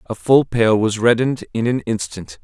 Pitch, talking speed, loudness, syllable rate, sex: 115 Hz, 195 wpm, -17 LUFS, 4.9 syllables/s, male